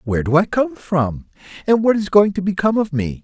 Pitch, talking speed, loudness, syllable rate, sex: 185 Hz, 240 wpm, -17 LUFS, 5.9 syllables/s, male